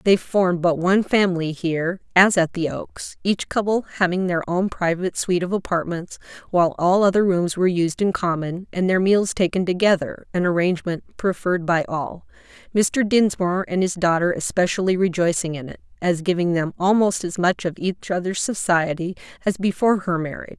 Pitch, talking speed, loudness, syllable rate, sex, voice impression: 180 Hz, 175 wpm, -21 LUFS, 5.4 syllables/s, female, feminine, adult-like, slightly clear, slightly intellectual, slightly sharp